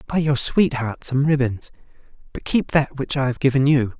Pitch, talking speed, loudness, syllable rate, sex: 140 Hz, 195 wpm, -20 LUFS, 5.0 syllables/s, male